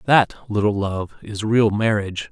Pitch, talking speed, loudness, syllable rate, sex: 105 Hz, 155 wpm, -20 LUFS, 4.6 syllables/s, male